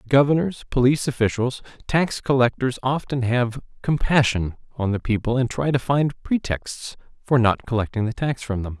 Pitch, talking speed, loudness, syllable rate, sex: 125 Hz, 155 wpm, -22 LUFS, 5.0 syllables/s, male